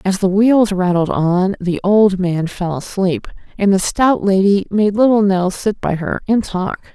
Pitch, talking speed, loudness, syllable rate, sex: 195 Hz, 190 wpm, -15 LUFS, 4.1 syllables/s, female